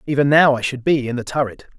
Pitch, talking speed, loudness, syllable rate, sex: 135 Hz, 270 wpm, -18 LUFS, 6.4 syllables/s, male